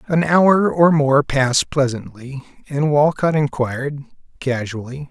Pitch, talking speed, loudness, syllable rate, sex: 145 Hz, 120 wpm, -17 LUFS, 4.2 syllables/s, male